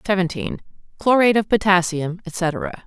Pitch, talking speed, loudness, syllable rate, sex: 190 Hz, 85 wpm, -20 LUFS, 4.8 syllables/s, female